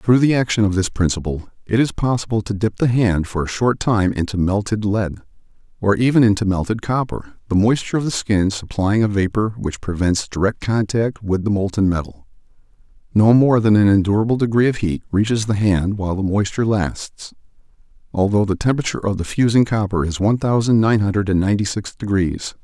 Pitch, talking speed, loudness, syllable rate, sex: 105 Hz, 190 wpm, -18 LUFS, 5.7 syllables/s, male